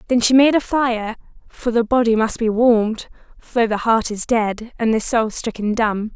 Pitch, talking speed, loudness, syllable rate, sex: 230 Hz, 205 wpm, -18 LUFS, 4.7 syllables/s, female